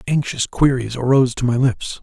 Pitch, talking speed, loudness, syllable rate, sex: 130 Hz, 180 wpm, -18 LUFS, 5.3 syllables/s, male